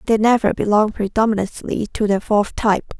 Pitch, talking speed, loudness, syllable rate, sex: 210 Hz, 160 wpm, -18 LUFS, 5.8 syllables/s, female